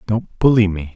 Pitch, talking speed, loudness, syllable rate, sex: 105 Hz, 190 wpm, -17 LUFS, 4.8 syllables/s, male